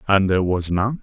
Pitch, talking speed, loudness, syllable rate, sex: 100 Hz, 235 wpm, -19 LUFS, 5.8 syllables/s, male